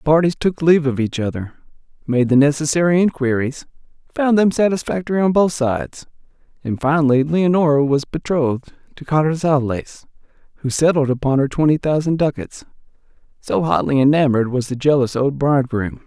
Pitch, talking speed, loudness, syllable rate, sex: 145 Hz, 145 wpm, -17 LUFS, 5.7 syllables/s, male